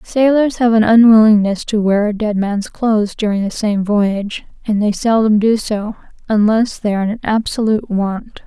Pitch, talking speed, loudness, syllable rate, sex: 215 Hz, 175 wpm, -14 LUFS, 4.9 syllables/s, female